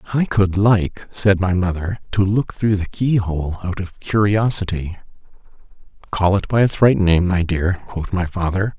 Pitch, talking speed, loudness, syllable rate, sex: 95 Hz, 170 wpm, -19 LUFS, 4.3 syllables/s, male